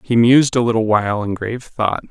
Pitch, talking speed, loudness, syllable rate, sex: 115 Hz, 230 wpm, -16 LUFS, 6.3 syllables/s, male